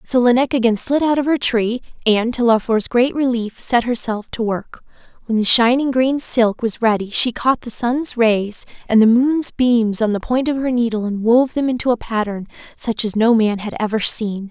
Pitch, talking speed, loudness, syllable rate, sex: 235 Hz, 215 wpm, -17 LUFS, 4.8 syllables/s, female